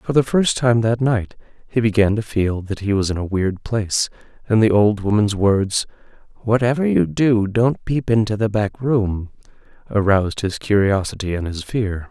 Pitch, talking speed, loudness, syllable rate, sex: 105 Hz, 185 wpm, -19 LUFS, 4.7 syllables/s, male